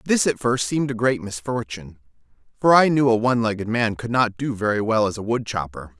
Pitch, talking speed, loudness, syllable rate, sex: 115 Hz, 230 wpm, -21 LUFS, 5.9 syllables/s, male